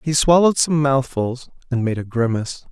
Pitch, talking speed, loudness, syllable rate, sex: 135 Hz, 175 wpm, -19 LUFS, 5.5 syllables/s, male